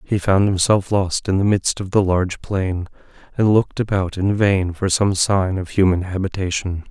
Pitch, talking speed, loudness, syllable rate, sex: 95 Hz, 190 wpm, -19 LUFS, 4.7 syllables/s, male